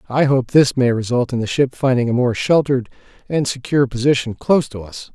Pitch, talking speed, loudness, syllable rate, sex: 130 Hz, 210 wpm, -17 LUFS, 5.9 syllables/s, male